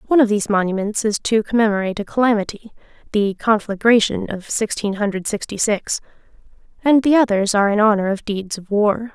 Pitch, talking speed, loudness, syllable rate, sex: 210 Hz, 155 wpm, -18 LUFS, 5.9 syllables/s, female